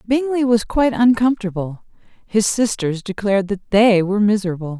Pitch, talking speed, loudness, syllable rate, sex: 210 Hz, 140 wpm, -18 LUFS, 5.7 syllables/s, female